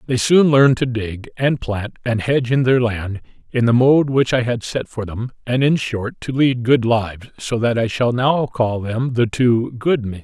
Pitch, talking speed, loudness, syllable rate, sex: 120 Hz, 230 wpm, -18 LUFS, 4.5 syllables/s, male